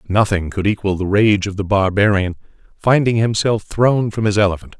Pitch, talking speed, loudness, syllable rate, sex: 100 Hz, 175 wpm, -17 LUFS, 5.2 syllables/s, male